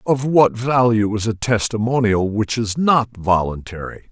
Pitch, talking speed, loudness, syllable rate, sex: 115 Hz, 145 wpm, -18 LUFS, 4.3 syllables/s, male